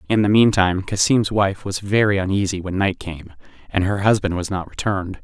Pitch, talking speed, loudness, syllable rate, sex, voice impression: 95 Hz, 195 wpm, -19 LUFS, 5.5 syllables/s, male, masculine, adult-like, slightly fluent, slightly refreshing, unique